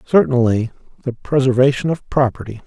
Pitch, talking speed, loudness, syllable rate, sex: 125 Hz, 115 wpm, -17 LUFS, 5.8 syllables/s, male